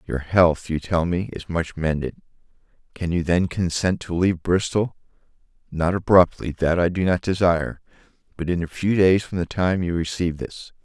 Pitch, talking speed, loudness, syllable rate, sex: 90 Hz, 170 wpm, -22 LUFS, 5.1 syllables/s, male